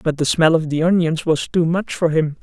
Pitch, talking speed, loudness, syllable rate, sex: 165 Hz, 275 wpm, -18 LUFS, 5.2 syllables/s, female